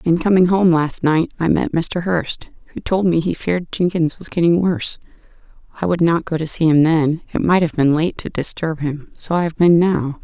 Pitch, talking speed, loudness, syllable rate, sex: 165 Hz, 230 wpm, -17 LUFS, 5.1 syllables/s, female